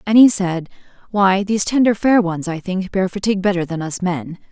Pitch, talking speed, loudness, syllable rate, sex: 190 Hz, 215 wpm, -17 LUFS, 5.4 syllables/s, female